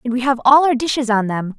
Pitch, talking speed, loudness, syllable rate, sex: 250 Hz, 305 wpm, -16 LUFS, 6.0 syllables/s, female